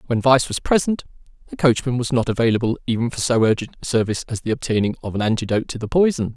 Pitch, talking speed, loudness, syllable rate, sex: 120 Hz, 225 wpm, -20 LUFS, 7.1 syllables/s, male